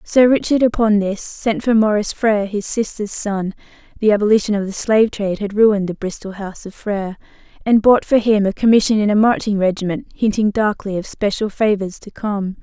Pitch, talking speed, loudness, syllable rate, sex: 210 Hz, 185 wpm, -17 LUFS, 5.7 syllables/s, female